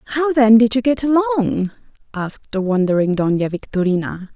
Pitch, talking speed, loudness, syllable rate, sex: 220 Hz, 150 wpm, -17 LUFS, 6.3 syllables/s, female